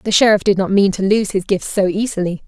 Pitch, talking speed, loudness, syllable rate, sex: 200 Hz, 265 wpm, -16 LUFS, 6.0 syllables/s, female